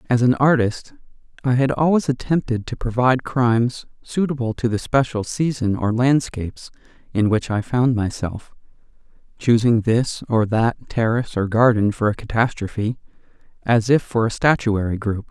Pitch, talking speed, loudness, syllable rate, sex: 120 Hz, 150 wpm, -20 LUFS, 4.8 syllables/s, male